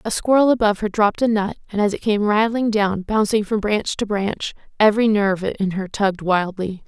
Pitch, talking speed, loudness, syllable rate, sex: 205 Hz, 210 wpm, -19 LUFS, 5.7 syllables/s, female